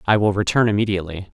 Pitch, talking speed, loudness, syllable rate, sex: 100 Hz, 170 wpm, -19 LUFS, 7.5 syllables/s, male